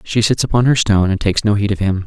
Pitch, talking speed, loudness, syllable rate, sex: 105 Hz, 320 wpm, -15 LUFS, 7.1 syllables/s, male